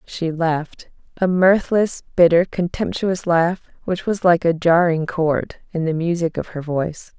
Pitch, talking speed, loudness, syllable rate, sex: 170 Hz, 150 wpm, -19 LUFS, 4.2 syllables/s, female